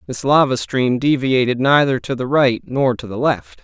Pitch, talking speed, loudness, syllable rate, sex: 125 Hz, 200 wpm, -17 LUFS, 4.7 syllables/s, male